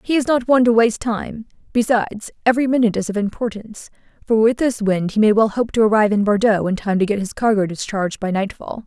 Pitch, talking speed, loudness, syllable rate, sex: 220 Hz, 230 wpm, -18 LUFS, 6.5 syllables/s, female